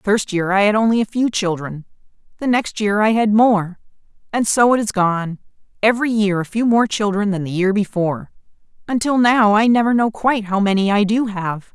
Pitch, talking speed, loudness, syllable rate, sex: 210 Hz, 200 wpm, -17 LUFS, 5.4 syllables/s, female